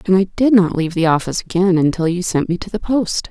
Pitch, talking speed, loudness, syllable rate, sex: 185 Hz, 270 wpm, -16 LUFS, 6.3 syllables/s, female